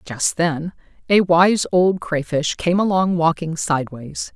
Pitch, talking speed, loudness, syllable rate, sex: 165 Hz, 140 wpm, -19 LUFS, 4.1 syllables/s, female